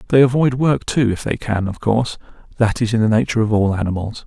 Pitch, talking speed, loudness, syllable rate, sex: 115 Hz, 240 wpm, -18 LUFS, 6.4 syllables/s, male